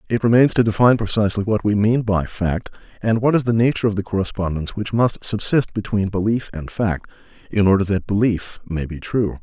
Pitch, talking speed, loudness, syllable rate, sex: 105 Hz, 205 wpm, -19 LUFS, 5.9 syllables/s, male